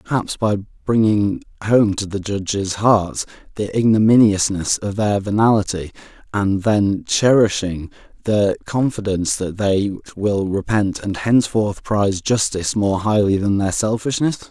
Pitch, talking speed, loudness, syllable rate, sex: 100 Hz, 130 wpm, -18 LUFS, 4.4 syllables/s, male